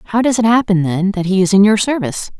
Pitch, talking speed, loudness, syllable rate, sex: 205 Hz, 275 wpm, -14 LUFS, 6.1 syllables/s, female